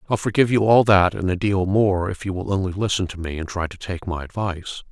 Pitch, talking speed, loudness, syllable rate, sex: 95 Hz, 270 wpm, -21 LUFS, 6.0 syllables/s, male